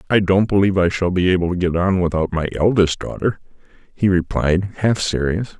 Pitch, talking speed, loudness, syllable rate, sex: 90 Hz, 195 wpm, -18 LUFS, 5.5 syllables/s, male